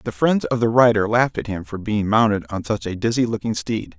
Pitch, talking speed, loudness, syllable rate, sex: 110 Hz, 255 wpm, -20 LUFS, 5.7 syllables/s, male